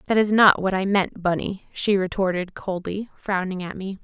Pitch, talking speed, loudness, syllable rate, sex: 190 Hz, 195 wpm, -22 LUFS, 4.9 syllables/s, female